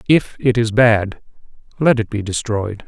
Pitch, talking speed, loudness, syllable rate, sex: 115 Hz, 165 wpm, -17 LUFS, 4.3 syllables/s, male